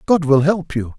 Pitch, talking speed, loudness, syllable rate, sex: 155 Hz, 245 wpm, -16 LUFS, 4.8 syllables/s, male